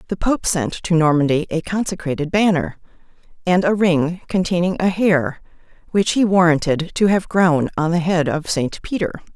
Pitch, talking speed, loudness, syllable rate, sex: 175 Hz, 165 wpm, -18 LUFS, 4.8 syllables/s, female